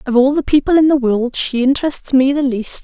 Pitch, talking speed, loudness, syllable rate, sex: 270 Hz, 255 wpm, -14 LUFS, 5.6 syllables/s, female